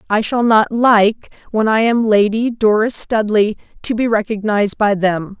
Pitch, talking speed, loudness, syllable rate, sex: 215 Hz, 165 wpm, -15 LUFS, 4.6 syllables/s, female